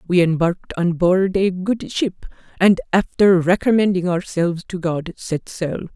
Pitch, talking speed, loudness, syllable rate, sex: 180 Hz, 150 wpm, -19 LUFS, 4.6 syllables/s, female